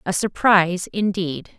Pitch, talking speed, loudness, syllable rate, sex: 185 Hz, 115 wpm, -20 LUFS, 4.4 syllables/s, female